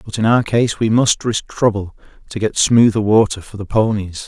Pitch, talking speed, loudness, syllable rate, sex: 110 Hz, 210 wpm, -16 LUFS, 5.0 syllables/s, male